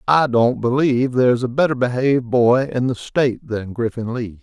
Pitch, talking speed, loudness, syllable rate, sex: 125 Hz, 205 wpm, -18 LUFS, 5.4 syllables/s, male